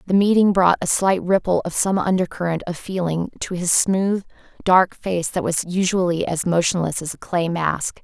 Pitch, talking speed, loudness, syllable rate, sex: 180 Hz, 185 wpm, -20 LUFS, 4.9 syllables/s, female